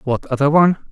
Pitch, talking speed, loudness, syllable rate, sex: 145 Hz, 195 wpm, -16 LUFS, 6.9 syllables/s, male